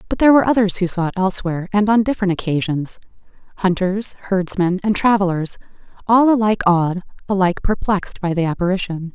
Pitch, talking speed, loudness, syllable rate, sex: 190 Hz, 150 wpm, -18 LUFS, 6.5 syllables/s, female